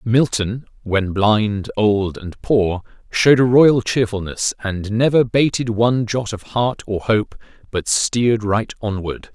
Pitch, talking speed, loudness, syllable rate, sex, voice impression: 110 Hz, 150 wpm, -18 LUFS, 3.9 syllables/s, male, very masculine, very adult-like, middle-aged, very thick, tensed, slightly powerful, slightly bright, hard, slightly clear, slightly fluent, cool, very intellectual, sincere, calm, mature, friendly, reassuring, slightly wild, slightly lively, slightly kind